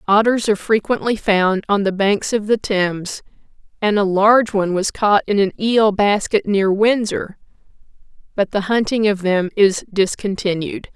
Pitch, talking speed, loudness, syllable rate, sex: 205 Hz, 160 wpm, -17 LUFS, 4.7 syllables/s, female